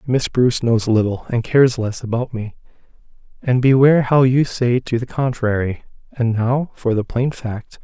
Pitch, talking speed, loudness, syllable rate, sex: 120 Hz, 170 wpm, -18 LUFS, 4.8 syllables/s, male